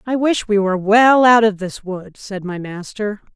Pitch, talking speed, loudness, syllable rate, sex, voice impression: 205 Hz, 215 wpm, -15 LUFS, 4.5 syllables/s, female, feminine, adult-like, slightly intellectual, slightly unique, slightly strict